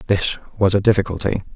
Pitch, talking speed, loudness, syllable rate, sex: 100 Hz, 155 wpm, -19 LUFS, 6.5 syllables/s, male